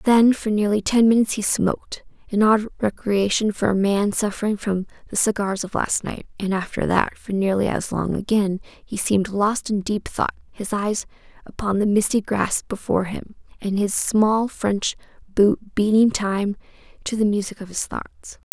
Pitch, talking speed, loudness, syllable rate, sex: 205 Hz, 170 wpm, -21 LUFS, 4.7 syllables/s, female